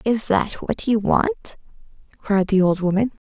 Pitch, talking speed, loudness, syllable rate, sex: 200 Hz, 165 wpm, -20 LUFS, 4.1 syllables/s, female